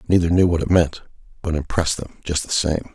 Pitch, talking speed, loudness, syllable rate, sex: 85 Hz, 225 wpm, -20 LUFS, 6.5 syllables/s, male